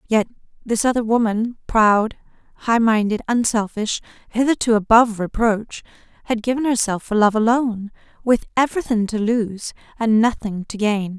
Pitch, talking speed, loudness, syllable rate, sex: 225 Hz, 130 wpm, -19 LUFS, 5.0 syllables/s, female